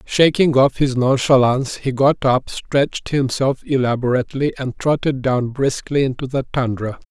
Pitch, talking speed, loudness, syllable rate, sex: 135 Hz, 145 wpm, -18 LUFS, 4.8 syllables/s, male